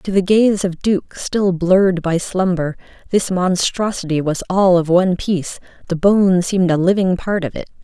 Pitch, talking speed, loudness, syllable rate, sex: 185 Hz, 175 wpm, -17 LUFS, 4.7 syllables/s, female